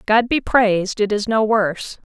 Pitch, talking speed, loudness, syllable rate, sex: 215 Hz, 200 wpm, -18 LUFS, 4.7 syllables/s, female